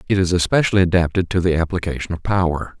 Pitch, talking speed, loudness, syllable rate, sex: 90 Hz, 195 wpm, -19 LUFS, 6.8 syllables/s, male